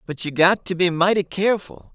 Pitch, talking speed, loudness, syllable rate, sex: 180 Hz, 215 wpm, -20 LUFS, 5.6 syllables/s, male